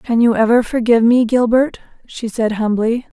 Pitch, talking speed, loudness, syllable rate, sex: 230 Hz, 170 wpm, -15 LUFS, 5.0 syllables/s, female